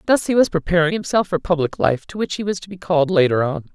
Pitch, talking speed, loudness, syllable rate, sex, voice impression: 175 Hz, 275 wpm, -19 LUFS, 6.5 syllables/s, female, very feminine, adult-like, thin, tensed, very powerful, bright, very hard, very clear, very fluent, cool, intellectual, very refreshing, sincere, slightly calm, slightly friendly, reassuring, slightly unique, slightly elegant, slightly wild, slightly sweet, lively, strict, slightly intense